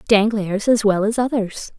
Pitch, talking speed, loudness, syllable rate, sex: 215 Hz, 170 wpm, -19 LUFS, 4.4 syllables/s, female